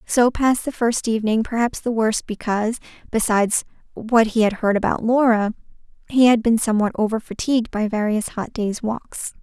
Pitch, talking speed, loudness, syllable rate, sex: 225 Hz, 170 wpm, -20 LUFS, 5.4 syllables/s, female